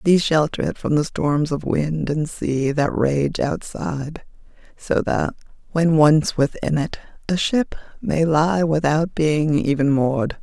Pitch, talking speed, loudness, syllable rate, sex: 150 Hz, 155 wpm, -20 LUFS, 4.0 syllables/s, female